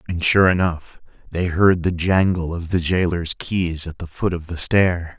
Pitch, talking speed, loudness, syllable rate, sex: 85 Hz, 195 wpm, -20 LUFS, 4.3 syllables/s, male